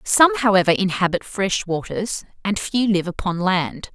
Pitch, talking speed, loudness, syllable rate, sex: 195 Hz, 165 wpm, -20 LUFS, 4.6 syllables/s, female